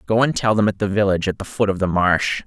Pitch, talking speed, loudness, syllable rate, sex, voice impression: 100 Hz, 315 wpm, -19 LUFS, 6.5 syllables/s, male, masculine, middle-aged, tensed, powerful, clear, raspy, cool, intellectual, sincere, calm, wild, lively